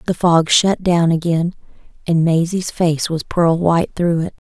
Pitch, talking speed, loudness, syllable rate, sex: 170 Hz, 175 wpm, -16 LUFS, 4.3 syllables/s, female